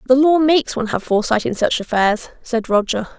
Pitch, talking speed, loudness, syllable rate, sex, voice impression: 240 Hz, 205 wpm, -17 LUFS, 6.0 syllables/s, female, feminine, adult-like, tensed, powerful, soft, slightly muffled, slightly nasal, slightly intellectual, calm, friendly, reassuring, lively, kind, slightly modest